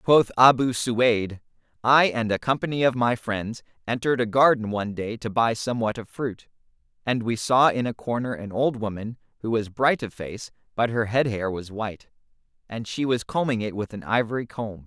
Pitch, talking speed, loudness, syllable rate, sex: 115 Hz, 200 wpm, -24 LUFS, 5.2 syllables/s, male